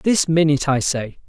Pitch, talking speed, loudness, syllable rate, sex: 150 Hz, 190 wpm, -18 LUFS, 5.1 syllables/s, male